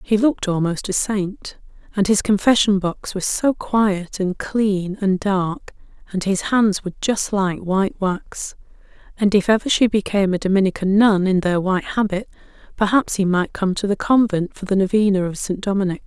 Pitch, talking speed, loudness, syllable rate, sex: 195 Hz, 180 wpm, -19 LUFS, 4.9 syllables/s, female